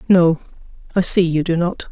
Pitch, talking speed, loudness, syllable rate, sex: 170 Hz, 190 wpm, -17 LUFS, 5.1 syllables/s, female